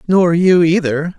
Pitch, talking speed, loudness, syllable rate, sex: 170 Hz, 150 wpm, -13 LUFS, 4.0 syllables/s, male